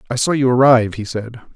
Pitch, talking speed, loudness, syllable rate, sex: 125 Hz, 230 wpm, -15 LUFS, 6.4 syllables/s, male